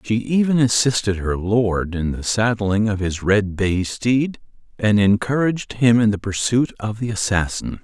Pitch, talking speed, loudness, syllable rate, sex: 110 Hz, 170 wpm, -19 LUFS, 4.4 syllables/s, male